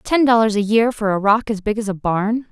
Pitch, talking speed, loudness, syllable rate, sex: 215 Hz, 285 wpm, -17 LUFS, 5.3 syllables/s, female